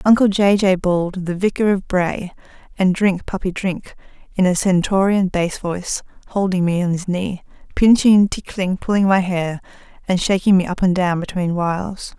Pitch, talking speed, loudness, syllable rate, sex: 185 Hz, 170 wpm, -18 LUFS, 4.8 syllables/s, female